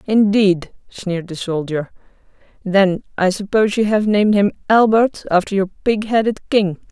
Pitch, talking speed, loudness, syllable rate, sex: 200 Hz, 150 wpm, -17 LUFS, 4.8 syllables/s, female